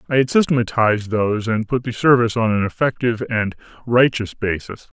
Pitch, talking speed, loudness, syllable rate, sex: 115 Hz, 170 wpm, -18 LUFS, 5.9 syllables/s, male